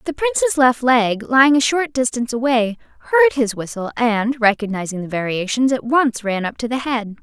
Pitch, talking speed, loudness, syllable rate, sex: 245 Hz, 190 wpm, -18 LUFS, 5.4 syllables/s, female